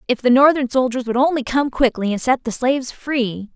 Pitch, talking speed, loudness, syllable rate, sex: 250 Hz, 220 wpm, -18 LUFS, 5.3 syllables/s, female